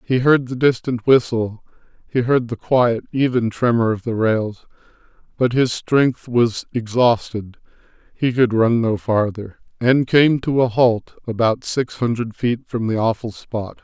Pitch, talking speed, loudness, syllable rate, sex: 120 Hz, 160 wpm, -19 LUFS, 4.1 syllables/s, male